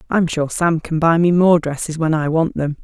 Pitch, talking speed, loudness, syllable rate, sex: 160 Hz, 255 wpm, -17 LUFS, 5.0 syllables/s, female